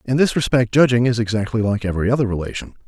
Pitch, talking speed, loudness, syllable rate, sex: 115 Hz, 210 wpm, -18 LUFS, 7.1 syllables/s, male